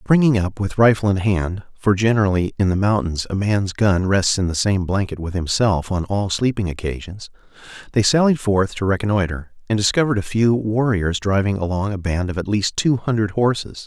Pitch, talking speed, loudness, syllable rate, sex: 100 Hz, 185 wpm, -19 LUFS, 5.3 syllables/s, male